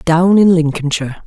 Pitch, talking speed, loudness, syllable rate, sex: 165 Hz, 140 wpm, -13 LUFS, 5.2 syllables/s, female